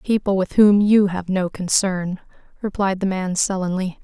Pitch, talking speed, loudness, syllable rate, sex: 190 Hz, 165 wpm, -19 LUFS, 4.6 syllables/s, female